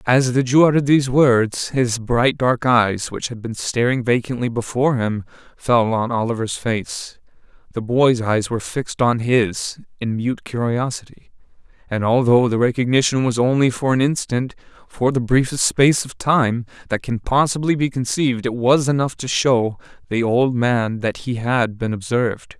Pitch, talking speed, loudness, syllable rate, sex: 125 Hz, 165 wpm, -19 LUFS, 4.7 syllables/s, male